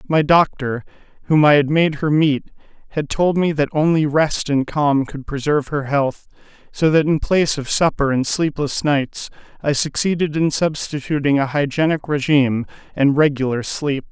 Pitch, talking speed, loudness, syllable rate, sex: 145 Hz, 165 wpm, -18 LUFS, 4.8 syllables/s, male